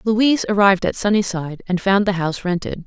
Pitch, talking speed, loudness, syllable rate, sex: 195 Hz, 190 wpm, -18 LUFS, 6.3 syllables/s, female